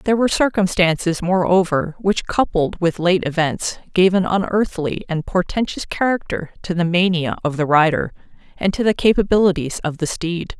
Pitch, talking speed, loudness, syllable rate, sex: 180 Hz, 160 wpm, -18 LUFS, 5.1 syllables/s, female